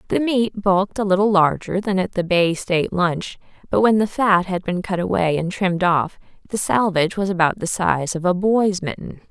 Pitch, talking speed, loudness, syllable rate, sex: 185 Hz, 215 wpm, -19 LUFS, 5.1 syllables/s, female